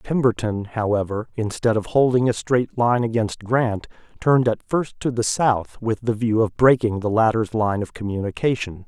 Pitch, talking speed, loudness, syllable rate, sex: 115 Hz, 175 wpm, -21 LUFS, 4.8 syllables/s, male